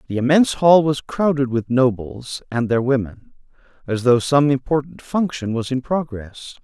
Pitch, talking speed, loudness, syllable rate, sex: 130 Hz, 165 wpm, -19 LUFS, 4.7 syllables/s, male